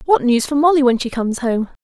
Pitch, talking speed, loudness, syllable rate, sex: 260 Hz, 260 wpm, -16 LUFS, 6.2 syllables/s, female